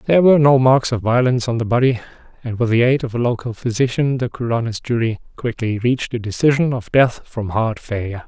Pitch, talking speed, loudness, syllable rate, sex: 120 Hz, 210 wpm, -18 LUFS, 6.1 syllables/s, male